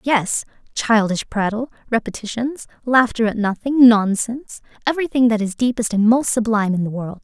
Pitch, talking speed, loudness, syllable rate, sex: 230 Hz, 150 wpm, -18 LUFS, 5.3 syllables/s, female